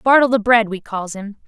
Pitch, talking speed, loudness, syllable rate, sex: 220 Hz, 245 wpm, -16 LUFS, 5.0 syllables/s, female